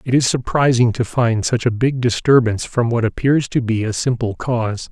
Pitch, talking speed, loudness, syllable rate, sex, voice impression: 120 Hz, 210 wpm, -17 LUFS, 5.2 syllables/s, male, very masculine, very middle-aged, very thick, slightly tensed, very powerful, slightly bright, soft, muffled, slightly fluent, raspy, cool, intellectual, slightly refreshing, sincere, very calm, very mature, friendly, reassuring, very unique, slightly elegant, wild, sweet, lively, kind, slightly intense